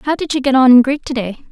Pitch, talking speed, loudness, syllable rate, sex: 260 Hz, 315 wpm, -13 LUFS, 6.3 syllables/s, female